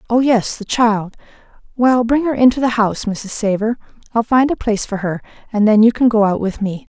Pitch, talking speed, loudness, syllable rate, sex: 225 Hz, 225 wpm, -16 LUFS, 5.5 syllables/s, female